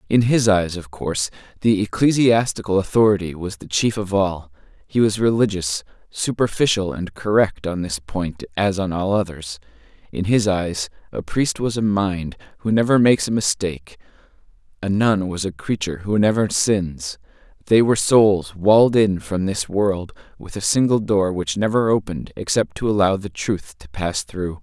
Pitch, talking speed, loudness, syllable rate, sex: 100 Hz, 170 wpm, -20 LUFS, 4.8 syllables/s, male